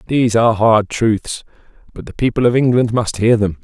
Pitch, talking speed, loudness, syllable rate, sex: 115 Hz, 200 wpm, -15 LUFS, 5.4 syllables/s, male